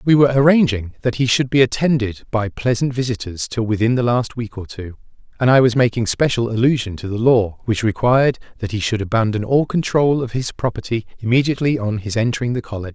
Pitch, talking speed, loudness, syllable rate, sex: 120 Hz, 205 wpm, -18 LUFS, 6.1 syllables/s, male